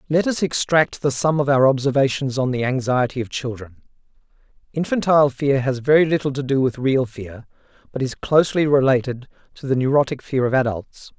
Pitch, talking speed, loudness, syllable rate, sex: 135 Hz, 175 wpm, -19 LUFS, 5.5 syllables/s, male